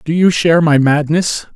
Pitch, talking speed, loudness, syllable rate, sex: 160 Hz, 195 wpm, -13 LUFS, 5.0 syllables/s, male